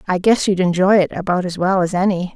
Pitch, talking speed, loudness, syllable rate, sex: 185 Hz, 255 wpm, -17 LUFS, 5.9 syllables/s, female